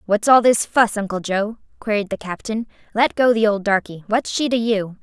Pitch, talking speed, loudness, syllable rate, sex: 215 Hz, 215 wpm, -19 LUFS, 5.1 syllables/s, female